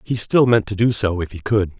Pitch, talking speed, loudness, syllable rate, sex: 105 Hz, 300 wpm, -18 LUFS, 5.5 syllables/s, male